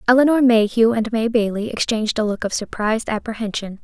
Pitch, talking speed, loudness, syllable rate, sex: 225 Hz, 170 wpm, -19 LUFS, 6.0 syllables/s, female